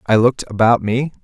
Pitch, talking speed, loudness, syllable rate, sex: 120 Hz, 195 wpm, -16 LUFS, 6.2 syllables/s, male